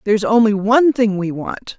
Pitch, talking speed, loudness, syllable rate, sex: 215 Hz, 200 wpm, -15 LUFS, 5.4 syllables/s, female